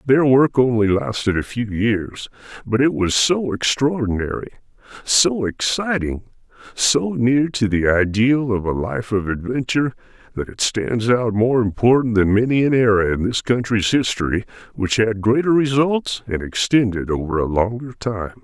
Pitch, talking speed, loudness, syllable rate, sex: 115 Hz, 155 wpm, -19 LUFS, 4.6 syllables/s, male